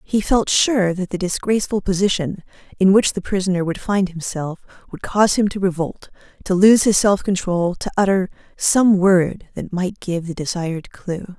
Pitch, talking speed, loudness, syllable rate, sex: 190 Hz, 180 wpm, -18 LUFS, 4.8 syllables/s, female